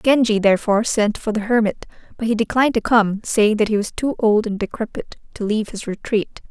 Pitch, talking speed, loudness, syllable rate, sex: 220 Hz, 210 wpm, -19 LUFS, 5.9 syllables/s, female